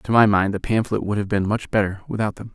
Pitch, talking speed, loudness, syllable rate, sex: 105 Hz, 280 wpm, -21 LUFS, 6.1 syllables/s, male